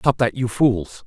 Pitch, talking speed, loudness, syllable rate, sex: 115 Hz, 225 wpm, -20 LUFS, 3.9 syllables/s, male